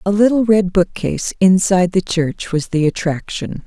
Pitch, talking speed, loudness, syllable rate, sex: 185 Hz, 165 wpm, -16 LUFS, 4.9 syllables/s, female